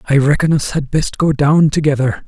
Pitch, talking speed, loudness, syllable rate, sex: 150 Hz, 210 wpm, -14 LUFS, 5.3 syllables/s, female